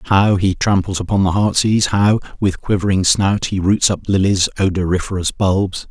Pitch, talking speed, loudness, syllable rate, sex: 95 Hz, 165 wpm, -16 LUFS, 4.9 syllables/s, male